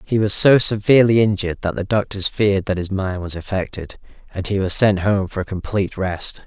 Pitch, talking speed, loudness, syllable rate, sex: 100 Hz, 215 wpm, -18 LUFS, 5.7 syllables/s, male